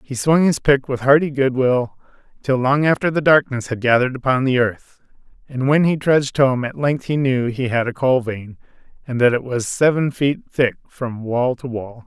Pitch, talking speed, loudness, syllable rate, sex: 130 Hz, 215 wpm, -18 LUFS, 4.9 syllables/s, male